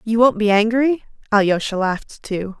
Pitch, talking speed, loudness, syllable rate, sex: 215 Hz, 160 wpm, -18 LUFS, 5.0 syllables/s, female